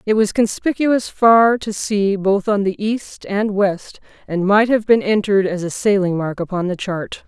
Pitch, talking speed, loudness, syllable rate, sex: 200 Hz, 200 wpm, -17 LUFS, 4.4 syllables/s, female